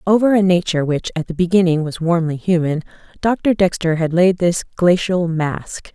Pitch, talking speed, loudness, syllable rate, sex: 175 Hz, 170 wpm, -17 LUFS, 5.1 syllables/s, female